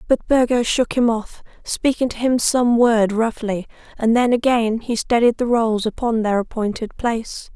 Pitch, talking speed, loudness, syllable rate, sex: 230 Hz, 175 wpm, -19 LUFS, 4.6 syllables/s, female